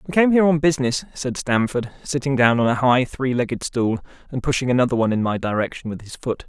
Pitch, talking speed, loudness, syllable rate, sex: 130 Hz, 230 wpm, -20 LUFS, 6.3 syllables/s, male